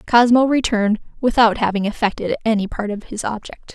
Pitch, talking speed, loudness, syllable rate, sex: 220 Hz, 160 wpm, -18 LUFS, 5.7 syllables/s, female